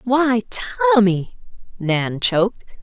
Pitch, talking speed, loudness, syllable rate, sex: 220 Hz, 85 wpm, -18 LUFS, 3.6 syllables/s, female